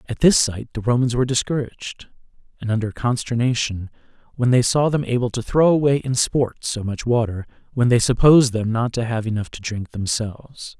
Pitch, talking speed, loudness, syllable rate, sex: 120 Hz, 190 wpm, -20 LUFS, 5.5 syllables/s, male